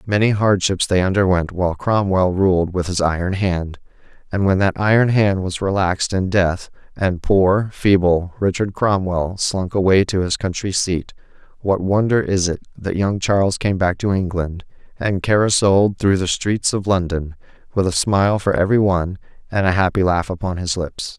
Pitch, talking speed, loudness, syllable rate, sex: 95 Hz, 175 wpm, -18 LUFS, 4.8 syllables/s, male